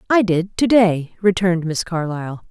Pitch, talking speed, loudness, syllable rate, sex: 180 Hz, 170 wpm, -18 LUFS, 4.9 syllables/s, female